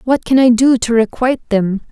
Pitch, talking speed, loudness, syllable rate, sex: 240 Hz, 220 wpm, -13 LUFS, 5.2 syllables/s, female